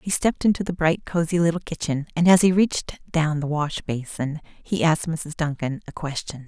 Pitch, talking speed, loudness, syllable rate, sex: 160 Hz, 205 wpm, -23 LUFS, 5.3 syllables/s, female